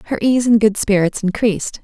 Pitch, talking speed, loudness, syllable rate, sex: 215 Hz, 195 wpm, -16 LUFS, 5.7 syllables/s, female